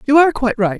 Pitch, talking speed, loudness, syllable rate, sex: 260 Hz, 305 wpm, -15 LUFS, 8.6 syllables/s, male